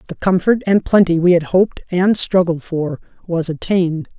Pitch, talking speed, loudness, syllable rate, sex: 175 Hz, 170 wpm, -16 LUFS, 5.0 syllables/s, female